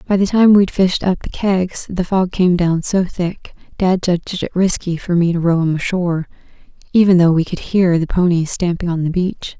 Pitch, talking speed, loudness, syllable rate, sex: 180 Hz, 220 wpm, -16 LUFS, 4.9 syllables/s, female